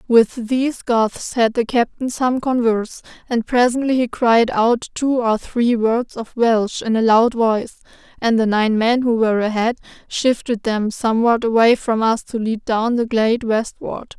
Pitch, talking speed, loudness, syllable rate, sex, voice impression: 230 Hz, 180 wpm, -18 LUFS, 4.4 syllables/s, female, very feminine, slightly young, slightly adult-like, thin, slightly tensed, slightly weak, slightly dark, slightly soft, clear, slightly halting, cute, very intellectual, slightly refreshing, very sincere, calm, friendly, reassuring, slightly unique, elegant, sweet, kind, very modest